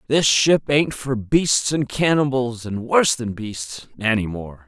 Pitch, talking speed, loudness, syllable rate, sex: 120 Hz, 165 wpm, -20 LUFS, 3.9 syllables/s, male